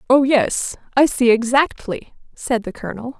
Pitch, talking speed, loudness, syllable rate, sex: 245 Hz, 150 wpm, -18 LUFS, 4.6 syllables/s, female